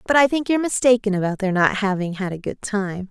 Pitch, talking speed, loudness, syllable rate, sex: 210 Hz, 250 wpm, -20 LUFS, 6.0 syllables/s, female